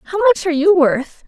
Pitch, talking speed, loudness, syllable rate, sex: 335 Hz, 235 wpm, -15 LUFS, 5.9 syllables/s, female